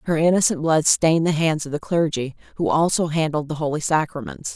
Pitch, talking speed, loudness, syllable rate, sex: 155 Hz, 200 wpm, -20 LUFS, 5.8 syllables/s, female